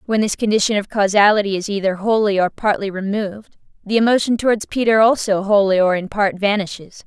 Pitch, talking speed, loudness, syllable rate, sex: 205 Hz, 180 wpm, -17 LUFS, 5.9 syllables/s, female